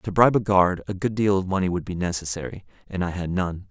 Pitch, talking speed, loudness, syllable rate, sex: 95 Hz, 260 wpm, -23 LUFS, 6.2 syllables/s, male